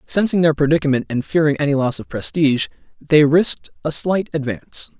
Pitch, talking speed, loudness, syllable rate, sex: 150 Hz, 170 wpm, -18 LUFS, 5.8 syllables/s, male